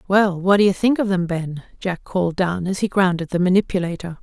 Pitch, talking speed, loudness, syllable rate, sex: 185 Hz, 225 wpm, -20 LUFS, 5.7 syllables/s, female